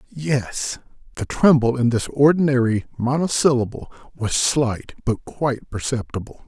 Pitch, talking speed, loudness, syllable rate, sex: 125 Hz, 110 wpm, -20 LUFS, 4.4 syllables/s, male